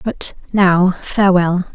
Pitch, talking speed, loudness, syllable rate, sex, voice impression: 185 Hz, 105 wpm, -15 LUFS, 3.5 syllables/s, female, slightly gender-neutral, young, slightly dark, slightly calm, slightly unique, slightly kind